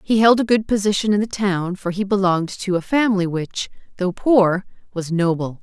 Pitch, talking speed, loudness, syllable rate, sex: 195 Hz, 205 wpm, -19 LUFS, 5.2 syllables/s, female